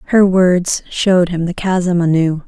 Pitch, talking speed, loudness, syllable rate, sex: 175 Hz, 170 wpm, -14 LUFS, 4.2 syllables/s, female